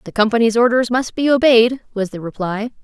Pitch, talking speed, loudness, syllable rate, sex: 230 Hz, 190 wpm, -16 LUFS, 5.6 syllables/s, female